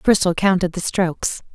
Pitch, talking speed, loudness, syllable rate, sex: 185 Hz, 155 wpm, -19 LUFS, 5.2 syllables/s, female